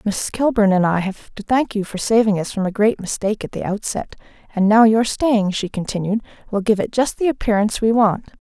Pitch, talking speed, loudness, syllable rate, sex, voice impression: 215 Hz, 230 wpm, -19 LUFS, 5.6 syllables/s, female, feminine, adult-like, relaxed, weak, soft, fluent, slightly raspy, calm, friendly, reassuring, elegant, kind, modest